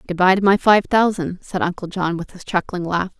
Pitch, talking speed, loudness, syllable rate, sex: 185 Hz, 245 wpm, -19 LUFS, 5.4 syllables/s, female